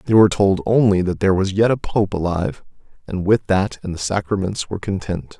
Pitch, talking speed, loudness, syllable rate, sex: 95 Hz, 210 wpm, -19 LUFS, 5.8 syllables/s, male